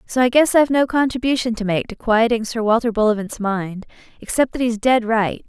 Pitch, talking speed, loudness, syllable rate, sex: 230 Hz, 210 wpm, -18 LUFS, 5.6 syllables/s, female